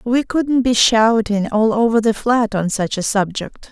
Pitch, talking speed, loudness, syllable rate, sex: 225 Hz, 195 wpm, -16 LUFS, 4.2 syllables/s, female